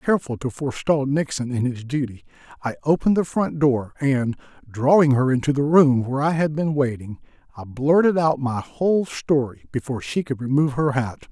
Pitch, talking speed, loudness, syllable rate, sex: 135 Hz, 185 wpm, -21 LUFS, 5.5 syllables/s, male